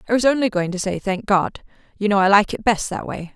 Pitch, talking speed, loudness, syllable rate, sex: 205 Hz, 285 wpm, -19 LUFS, 6.0 syllables/s, female